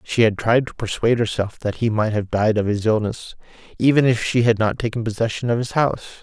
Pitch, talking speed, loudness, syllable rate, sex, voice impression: 115 Hz, 230 wpm, -20 LUFS, 6.0 syllables/s, male, masculine, adult-like, slightly muffled, friendly, slightly unique